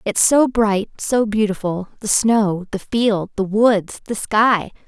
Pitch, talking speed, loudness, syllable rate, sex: 210 Hz, 150 wpm, -18 LUFS, 3.5 syllables/s, female